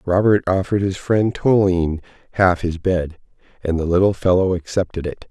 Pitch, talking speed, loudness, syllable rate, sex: 90 Hz, 160 wpm, -19 LUFS, 5.3 syllables/s, male